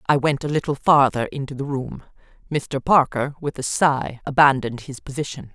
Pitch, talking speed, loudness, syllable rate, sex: 135 Hz, 175 wpm, -21 LUFS, 5.2 syllables/s, female